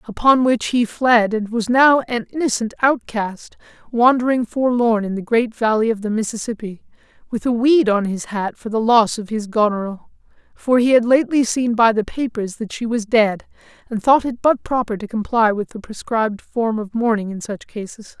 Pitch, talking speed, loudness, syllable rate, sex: 230 Hz, 195 wpm, -18 LUFS, 5.0 syllables/s, male